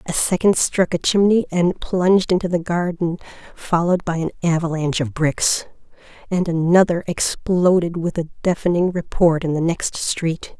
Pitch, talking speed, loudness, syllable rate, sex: 170 Hz, 155 wpm, -19 LUFS, 4.8 syllables/s, female